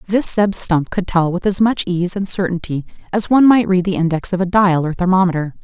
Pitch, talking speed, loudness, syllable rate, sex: 185 Hz, 235 wpm, -16 LUFS, 5.7 syllables/s, female